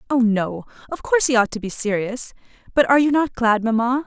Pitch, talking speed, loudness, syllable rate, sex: 240 Hz, 220 wpm, -19 LUFS, 6.0 syllables/s, female